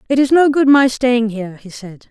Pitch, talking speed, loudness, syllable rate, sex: 245 Hz, 255 wpm, -13 LUFS, 5.2 syllables/s, female